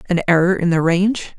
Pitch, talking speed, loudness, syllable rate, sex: 180 Hz, 215 wpm, -16 LUFS, 6.3 syllables/s, female